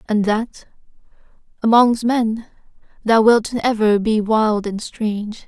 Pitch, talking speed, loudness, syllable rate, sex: 220 Hz, 120 wpm, -17 LUFS, 3.7 syllables/s, female